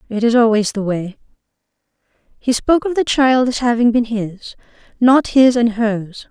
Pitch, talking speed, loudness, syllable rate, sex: 235 Hz, 160 wpm, -15 LUFS, 4.5 syllables/s, female